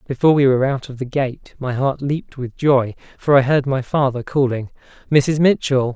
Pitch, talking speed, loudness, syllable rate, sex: 135 Hz, 200 wpm, -18 LUFS, 5.3 syllables/s, male